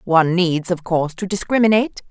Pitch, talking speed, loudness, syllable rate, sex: 180 Hz, 170 wpm, -18 LUFS, 6.1 syllables/s, female